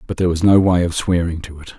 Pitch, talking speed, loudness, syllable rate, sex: 85 Hz, 305 wpm, -16 LUFS, 6.8 syllables/s, male